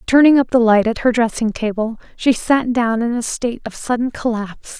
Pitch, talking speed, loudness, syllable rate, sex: 235 Hz, 215 wpm, -17 LUFS, 5.4 syllables/s, female